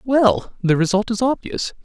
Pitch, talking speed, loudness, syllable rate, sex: 220 Hz, 165 wpm, -19 LUFS, 4.4 syllables/s, female